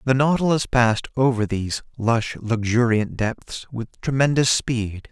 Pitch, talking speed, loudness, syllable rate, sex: 120 Hz, 130 wpm, -21 LUFS, 4.4 syllables/s, male